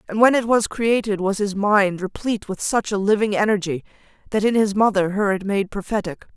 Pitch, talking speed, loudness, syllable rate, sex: 205 Hz, 210 wpm, -20 LUFS, 5.5 syllables/s, female